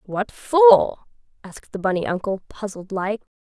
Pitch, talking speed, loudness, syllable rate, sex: 210 Hz, 140 wpm, -20 LUFS, 4.6 syllables/s, female